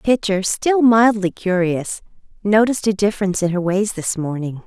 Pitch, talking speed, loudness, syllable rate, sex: 200 Hz, 155 wpm, -18 LUFS, 5.0 syllables/s, female